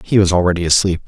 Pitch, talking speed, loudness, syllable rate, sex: 90 Hz, 225 wpm, -14 LUFS, 7.4 syllables/s, male